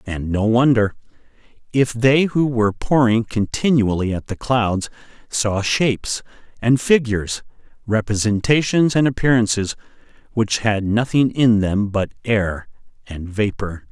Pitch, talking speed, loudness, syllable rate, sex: 115 Hz, 120 wpm, -19 LUFS, 4.3 syllables/s, male